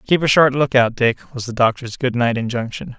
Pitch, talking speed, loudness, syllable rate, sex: 125 Hz, 220 wpm, -18 LUFS, 5.3 syllables/s, male